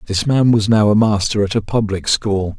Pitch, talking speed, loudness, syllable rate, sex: 105 Hz, 230 wpm, -16 LUFS, 5.0 syllables/s, male